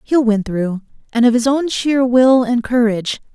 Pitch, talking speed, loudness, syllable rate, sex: 240 Hz, 200 wpm, -15 LUFS, 4.6 syllables/s, female